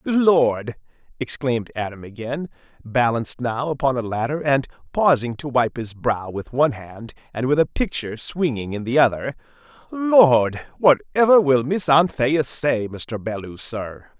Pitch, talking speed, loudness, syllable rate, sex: 135 Hz, 150 wpm, -20 LUFS, 4.4 syllables/s, male